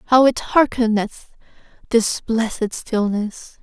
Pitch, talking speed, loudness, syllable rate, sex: 225 Hz, 100 wpm, -19 LUFS, 3.3 syllables/s, female